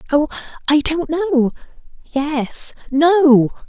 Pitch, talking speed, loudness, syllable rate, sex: 295 Hz, 50 wpm, -17 LUFS, 2.8 syllables/s, female